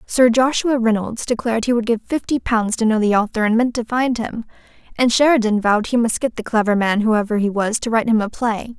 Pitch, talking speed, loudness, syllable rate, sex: 230 Hz, 240 wpm, -18 LUFS, 5.8 syllables/s, female